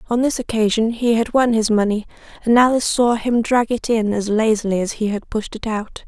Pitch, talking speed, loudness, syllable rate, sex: 225 Hz, 225 wpm, -18 LUFS, 5.5 syllables/s, female